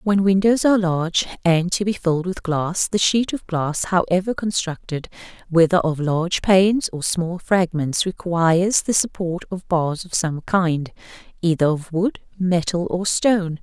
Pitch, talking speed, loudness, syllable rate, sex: 180 Hz, 165 wpm, -20 LUFS, 4.5 syllables/s, female